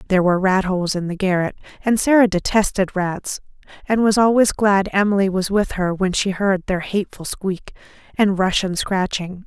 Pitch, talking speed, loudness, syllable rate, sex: 195 Hz, 185 wpm, -19 LUFS, 5.2 syllables/s, female